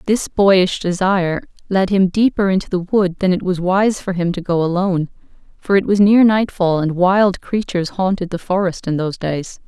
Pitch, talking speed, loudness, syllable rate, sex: 185 Hz, 200 wpm, -17 LUFS, 5.0 syllables/s, female